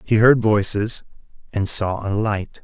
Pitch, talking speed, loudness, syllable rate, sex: 105 Hz, 160 wpm, -19 LUFS, 3.9 syllables/s, male